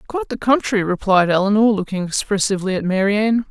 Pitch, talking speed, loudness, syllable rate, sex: 200 Hz, 155 wpm, -18 LUFS, 6.6 syllables/s, female